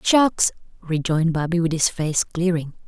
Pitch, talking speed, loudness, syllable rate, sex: 170 Hz, 125 wpm, -21 LUFS, 4.7 syllables/s, female